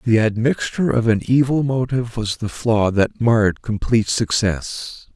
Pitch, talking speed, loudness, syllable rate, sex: 115 Hz, 150 wpm, -19 LUFS, 4.6 syllables/s, male